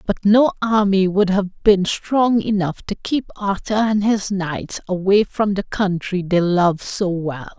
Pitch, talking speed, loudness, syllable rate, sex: 195 Hz, 175 wpm, -18 LUFS, 4.0 syllables/s, female